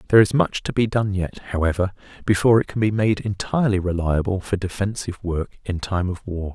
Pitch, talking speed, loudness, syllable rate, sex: 100 Hz, 200 wpm, -22 LUFS, 5.9 syllables/s, male